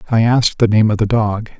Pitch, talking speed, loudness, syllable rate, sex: 110 Hz, 265 wpm, -14 LUFS, 6.2 syllables/s, male